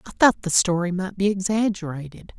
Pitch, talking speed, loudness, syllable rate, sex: 190 Hz, 175 wpm, -22 LUFS, 5.5 syllables/s, female